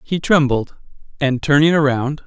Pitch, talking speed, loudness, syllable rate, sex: 145 Hz, 130 wpm, -16 LUFS, 4.6 syllables/s, male